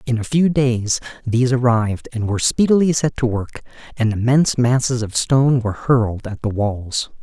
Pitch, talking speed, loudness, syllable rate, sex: 120 Hz, 185 wpm, -18 LUFS, 5.4 syllables/s, male